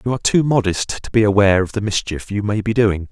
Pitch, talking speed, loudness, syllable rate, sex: 105 Hz, 270 wpm, -17 LUFS, 6.4 syllables/s, male